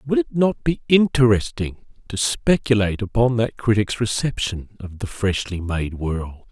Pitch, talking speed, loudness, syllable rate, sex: 110 Hz, 145 wpm, -21 LUFS, 4.5 syllables/s, male